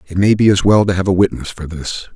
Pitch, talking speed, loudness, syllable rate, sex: 95 Hz, 305 wpm, -14 LUFS, 6.2 syllables/s, male